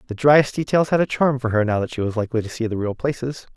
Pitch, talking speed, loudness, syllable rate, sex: 125 Hz, 305 wpm, -20 LUFS, 6.7 syllables/s, male